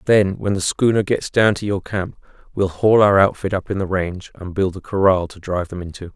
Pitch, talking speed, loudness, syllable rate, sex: 95 Hz, 245 wpm, -19 LUFS, 5.6 syllables/s, male